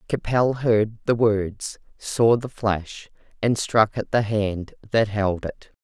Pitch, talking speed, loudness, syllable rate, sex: 110 Hz, 155 wpm, -22 LUFS, 3.3 syllables/s, female